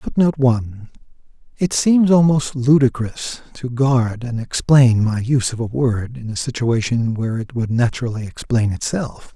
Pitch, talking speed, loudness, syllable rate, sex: 125 Hz, 155 wpm, -18 LUFS, 4.7 syllables/s, male